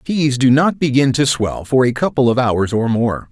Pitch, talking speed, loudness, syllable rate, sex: 130 Hz, 235 wpm, -15 LUFS, 4.7 syllables/s, male